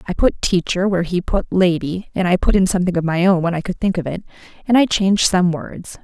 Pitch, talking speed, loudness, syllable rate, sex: 180 Hz, 260 wpm, -18 LUFS, 6.0 syllables/s, female